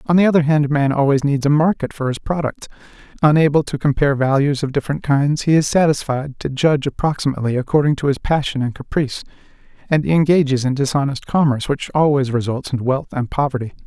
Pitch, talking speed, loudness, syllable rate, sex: 140 Hz, 190 wpm, -18 LUFS, 6.3 syllables/s, male